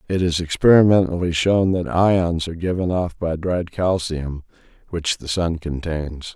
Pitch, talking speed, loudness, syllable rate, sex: 85 Hz, 150 wpm, -20 LUFS, 4.4 syllables/s, male